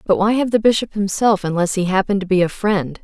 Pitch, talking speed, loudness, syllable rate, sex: 195 Hz, 255 wpm, -17 LUFS, 5.8 syllables/s, female